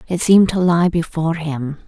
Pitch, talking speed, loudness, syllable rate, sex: 165 Hz, 190 wpm, -16 LUFS, 5.5 syllables/s, female